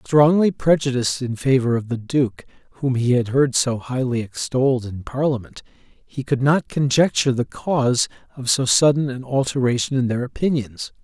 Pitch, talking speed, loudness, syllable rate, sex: 130 Hz, 165 wpm, -20 LUFS, 5.0 syllables/s, male